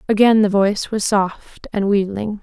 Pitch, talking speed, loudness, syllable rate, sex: 205 Hz, 175 wpm, -17 LUFS, 4.6 syllables/s, female